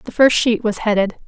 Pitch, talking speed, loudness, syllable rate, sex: 225 Hz, 235 wpm, -16 LUFS, 5.1 syllables/s, female